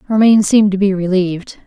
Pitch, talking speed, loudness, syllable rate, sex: 195 Hz, 180 wpm, -13 LUFS, 7.1 syllables/s, female